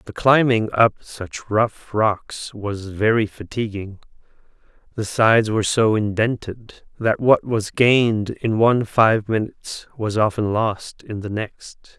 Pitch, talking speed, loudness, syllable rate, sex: 110 Hz, 140 wpm, -20 LUFS, 3.9 syllables/s, male